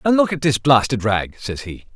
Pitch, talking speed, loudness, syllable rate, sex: 130 Hz, 245 wpm, -18 LUFS, 5.2 syllables/s, male